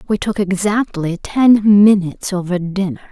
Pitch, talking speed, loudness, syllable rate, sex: 195 Hz, 135 wpm, -15 LUFS, 4.6 syllables/s, female